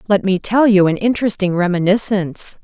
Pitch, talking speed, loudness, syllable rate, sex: 195 Hz, 160 wpm, -15 LUFS, 5.7 syllables/s, female